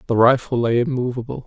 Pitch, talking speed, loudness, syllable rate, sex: 120 Hz, 165 wpm, -19 LUFS, 6.2 syllables/s, male